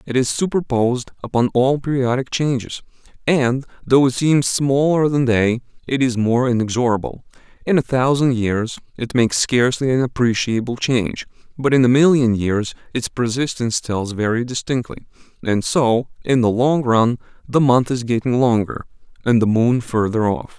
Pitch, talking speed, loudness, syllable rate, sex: 125 Hz, 155 wpm, -18 LUFS, 5.0 syllables/s, male